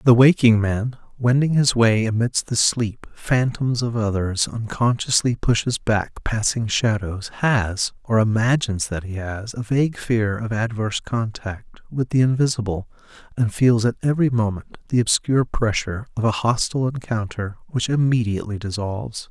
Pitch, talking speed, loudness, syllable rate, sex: 115 Hz, 145 wpm, -21 LUFS, 4.8 syllables/s, male